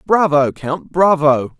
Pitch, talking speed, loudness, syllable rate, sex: 155 Hz, 115 wpm, -15 LUFS, 3.4 syllables/s, male